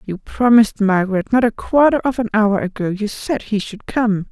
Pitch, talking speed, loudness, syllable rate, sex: 215 Hz, 195 wpm, -17 LUFS, 5.0 syllables/s, female